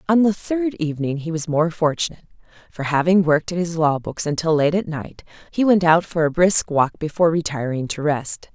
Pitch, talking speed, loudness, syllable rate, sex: 165 Hz, 210 wpm, -20 LUFS, 5.6 syllables/s, female